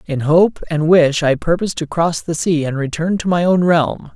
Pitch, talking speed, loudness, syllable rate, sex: 165 Hz, 230 wpm, -16 LUFS, 4.8 syllables/s, male